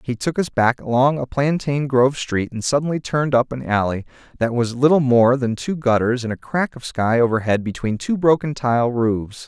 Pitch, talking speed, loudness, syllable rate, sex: 130 Hz, 210 wpm, -19 LUFS, 5.2 syllables/s, male